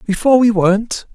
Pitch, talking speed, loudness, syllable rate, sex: 215 Hz, 160 wpm, -13 LUFS, 6.3 syllables/s, male